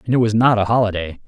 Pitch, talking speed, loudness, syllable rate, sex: 110 Hz, 285 wpm, -17 LUFS, 7.2 syllables/s, male